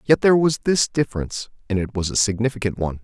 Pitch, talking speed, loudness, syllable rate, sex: 115 Hz, 220 wpm, -21 LUFS, 6.9 syllables/s, male